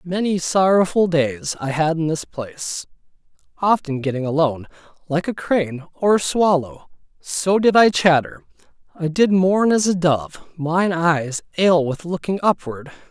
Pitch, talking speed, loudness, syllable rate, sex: 165 Hz, 150 wpm, -19 LUFS, 4.4 syllables/s, male